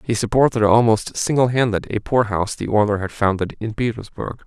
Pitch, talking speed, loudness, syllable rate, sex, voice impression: 110 Hz, 160 wpm, -19 LUFS, 5.6 syllables/s, male, masculine, adult-like, slightly thin, tensed, clear, fluent, cool, calm, friendly, reassuring, slightly wild, kind, slightly modest